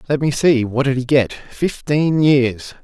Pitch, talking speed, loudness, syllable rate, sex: 135 Hz, 170 wpm, -17 LUFS, 3.9 syllables/s, male